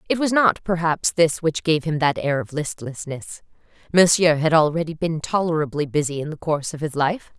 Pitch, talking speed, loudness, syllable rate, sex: 160 Hz, 195 wpm, -21 LUFS, 5.3 syllables/s, female